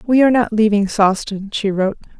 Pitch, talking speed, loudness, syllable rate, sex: 215 Hz, 190 wpm, -16 LUFS, 5.8 syllables/s, female